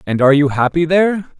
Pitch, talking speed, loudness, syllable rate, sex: 155 Hz, 215 wpm, -14 LUFS, 6.7 syllables/s, male